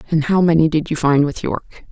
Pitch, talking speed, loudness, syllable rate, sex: 160 Hz, 250 wpm, -17 LUFS, 6.1 syllables/s, female